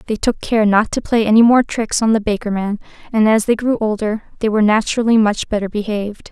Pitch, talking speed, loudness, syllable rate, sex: 215 Hz, 230 wpm, -16 LUFS, 6.1 syllables/s, female